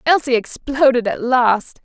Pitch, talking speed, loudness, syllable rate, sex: 255 Hz, 130 wpm, -16 LUFS, 4.1 syllables/s, female